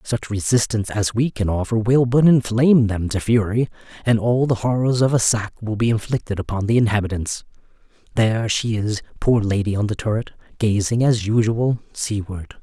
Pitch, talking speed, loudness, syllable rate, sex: 110 Hz, 175 wpm, -20 LUFS, 5.3 syllables/s, male